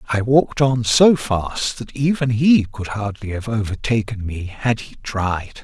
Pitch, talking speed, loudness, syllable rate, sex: 115 Hz, 170 wpm, -19 LUFS, 4.1 syllables/s, male